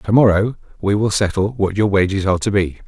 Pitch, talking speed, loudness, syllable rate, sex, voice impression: 100 Hz, 230 wpm, -17 LUFS, 5.9 syllables/s, male, masculine, middle-aged, tensed, powerful, slightly soft, clear, raspy, cool, intellectual, friendly, reassuring, wild, lively, kind